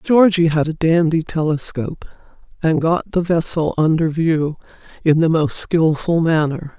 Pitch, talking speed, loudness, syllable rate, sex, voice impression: 160 Hz, 140 wpm, -17 LUFS, 4.4 syllables/s, female, slightly feminine, very adult-like, slightly dark, slightly raspy, very calm, slightly unique, very elegant